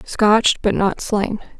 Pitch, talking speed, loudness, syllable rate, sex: 210 Hz, 150 wpm, -17 LUFS, 3.9 syllables/s, female